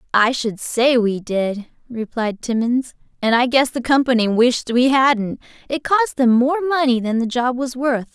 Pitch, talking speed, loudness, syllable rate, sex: 245 Hz, 185 wpm, -18 LUFS, 4.4 syllables/s, female